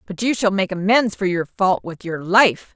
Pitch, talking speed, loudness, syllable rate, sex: 195 Hz, 240 wpm, -19 LUFS, 4.6 syllables/s, female